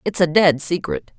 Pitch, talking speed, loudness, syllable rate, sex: 175 Hz, 205 wpm, -18 LUFS, 4.7 syllables/s, female